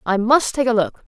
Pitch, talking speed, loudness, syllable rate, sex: 235 Hz, 255 wpm, -18 LUFS, 5.3 syllables/s, female